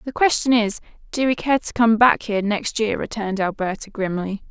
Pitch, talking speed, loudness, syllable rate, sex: 220 Hz, 200 wpm, -20 LUFS, 5.5 syllables/s, female